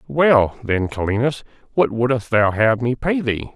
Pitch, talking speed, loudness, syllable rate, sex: 120 Hz, 170 wpm, -19 LUFS, 4.1 syllables/s, male